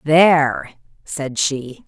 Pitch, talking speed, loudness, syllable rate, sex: 145 Hz, 95 wpm, -17 LUFS, 2.8 syllables/s, female